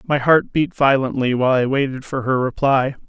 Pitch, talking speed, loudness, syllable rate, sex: 135 Hz, 195 wpm, -18 LUFS, 5.2 syllables/s, male